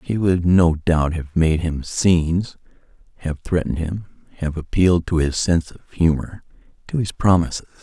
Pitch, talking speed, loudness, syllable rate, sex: 85 Hz, 160 wpm, -20 LUFS, 5.0 syllables/s, male